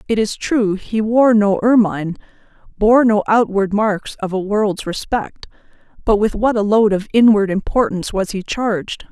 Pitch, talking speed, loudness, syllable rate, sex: 210 Hz, 170 wpm, -16 LUFS, 4.6 syllables/s, female